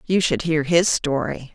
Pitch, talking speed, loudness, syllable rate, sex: 160 Hz, 195 wpm, -20 LUFS, 4.3 syllables/s, female